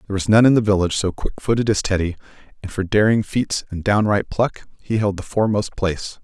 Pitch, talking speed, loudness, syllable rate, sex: 100 Hz, 220 wpm, -19 LUFS, 6.1 syllables/s, male